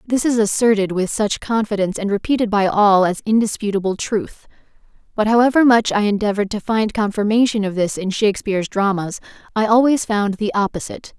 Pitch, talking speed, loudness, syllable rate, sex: 210 Hz, 165 wpm, -18 LUFS, 5.9 syllables/s, female